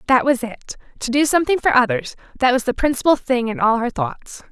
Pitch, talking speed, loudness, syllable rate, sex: 265 Hz, 215 wpm, -18 LUFS, 6.0 syllables/s, female